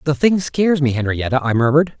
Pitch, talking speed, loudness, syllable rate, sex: 140 Hz, 210 wpm, -17 LUFS, 6.4 syllables/s, male